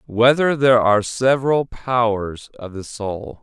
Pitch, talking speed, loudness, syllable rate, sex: 115 Hz, 140 wpm, -18 LUFS, 4.4 syllables/s, male